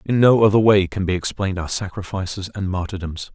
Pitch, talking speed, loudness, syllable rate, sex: 95 Hz, 195 wpm, -20 LUFS, 5.9 syllables/s, male